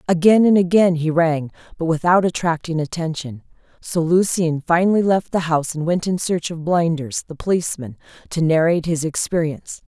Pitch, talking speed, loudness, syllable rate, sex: 165 Hz, 165 wpm, -19 LUFS, 5.4 syllables/s, female